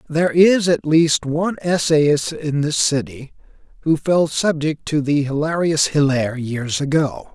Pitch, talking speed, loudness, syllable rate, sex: 150 Hz, 145 wpm, -18 LUFS, 4.2 syllables/s, male